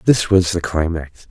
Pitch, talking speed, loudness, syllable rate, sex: 90 Hz, 185 wpm, -18 LUFS, 4.3 syllables/s, male